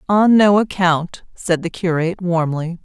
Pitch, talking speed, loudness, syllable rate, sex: 175 Hz, 150 wpm, -17 LUFS, 4.4 syllables/s, female